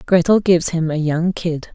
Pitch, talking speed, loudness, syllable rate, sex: 170 Hz, 205 wpm, -17 LUFS, 5.0 syllables/s, female